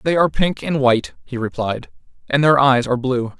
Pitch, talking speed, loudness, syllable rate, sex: 135 Hz, 210 wpm, -18 LUFS, 5.7 syllables/s, male